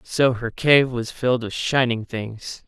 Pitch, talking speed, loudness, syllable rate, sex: 120 Hz, 180 wpm, -21 LUFS, 3.9 syllables/s, male